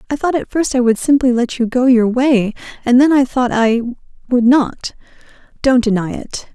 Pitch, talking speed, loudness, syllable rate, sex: 250 Hz, 190 wpm, -15 LUFS, 4.9 syllables/s, female